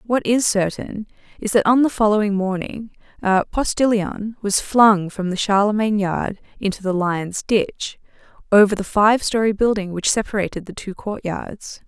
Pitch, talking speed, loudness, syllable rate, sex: 205 Hz, 160 wpm, -19 LUFS, 4.6 syllables/s, female